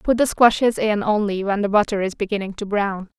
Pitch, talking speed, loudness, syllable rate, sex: 210 Hz, 225 wpm, -20 LUFS, 5.6 syllables/s, female